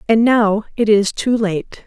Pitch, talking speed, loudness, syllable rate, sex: 215 Hz, 195 wpm, -16 LUFS, 3.8 syllables/s, female